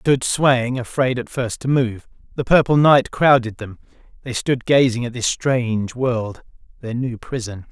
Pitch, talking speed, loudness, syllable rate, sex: 125 Hz, 170 wpm, -19 LUFS, 4.3 syllables/s, male